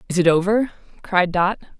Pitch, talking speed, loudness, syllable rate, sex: 190 Hz, 165 wpm, -19 LUFS, 5.3 syllables/s, female